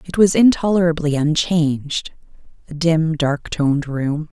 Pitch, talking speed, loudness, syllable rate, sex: 160 Hz, 125 wpm, -18 LUFS, 4.3 syllables/s, female